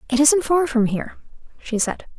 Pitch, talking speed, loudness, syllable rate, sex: 270 Hz, 190 wpm, -20 LUFS, 5.3 syllables/s, female